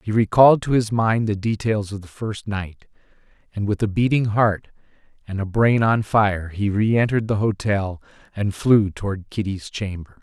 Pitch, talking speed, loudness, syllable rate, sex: 105 Hz, 175 wpm, -20 LUFS, 4.8 syllables/s, male